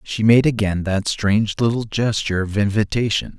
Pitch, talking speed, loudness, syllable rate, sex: 105 Hz, 160 wpm, -19 LUFS, 5.2 syllables/s, male